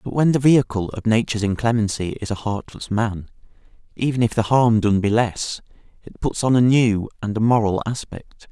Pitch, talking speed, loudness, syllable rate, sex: 110 Hz, 190 wpm, -20 LUFS, 5.3 syllables/s, male